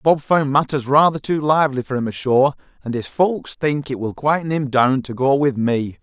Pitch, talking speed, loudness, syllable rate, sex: 135 Hz, 220 wpm, -18 LUFS, 5.0 syllables/s, male